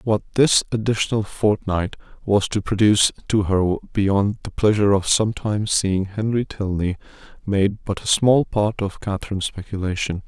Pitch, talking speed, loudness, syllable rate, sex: 100 Hz, 145 wpm, -20 LUFS, 5.0 syllables/s, male